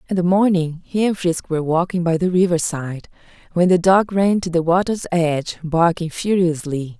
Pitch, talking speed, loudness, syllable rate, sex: 175 Hz, 180 wpm, -18 LUFS, 5.2 syllables/s, female